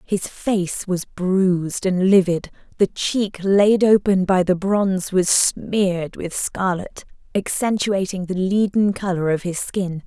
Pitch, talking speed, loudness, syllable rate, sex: 190 Hz, 145 wpm, -20 LUFS, 3.8 syllables/s, female